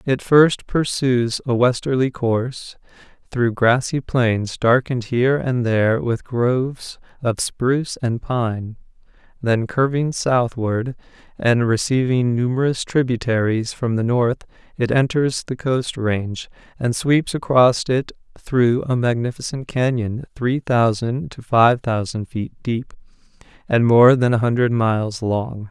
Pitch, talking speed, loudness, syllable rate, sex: 120 Hz, 130 wpm, -19 LUFS, 4.0 syllables/s, male